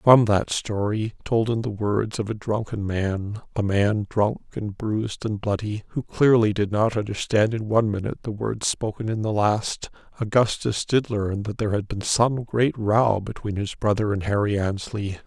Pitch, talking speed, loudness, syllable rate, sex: 105 Hz, 180 wpm, -24 LUFS, 4.7 syllables/s, male